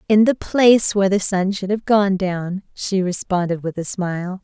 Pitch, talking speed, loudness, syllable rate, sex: 190 Hz, 205 wpm, -19 LUFS, 4.8 syllables/s, female